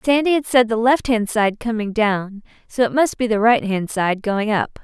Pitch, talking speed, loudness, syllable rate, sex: 225 Hz, 225 wpm, -18 LUFS, 4.7 syllables/s, female